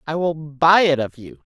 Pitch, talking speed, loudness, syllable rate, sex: 155 Hz, 235 wpm, -18 LUFS, 4.7 syllables/s, female